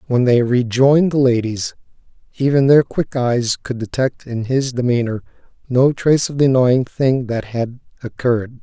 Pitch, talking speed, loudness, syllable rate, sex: 125 Hz, 160 wpm, -17 LUFS, 4.7 syllables/s, male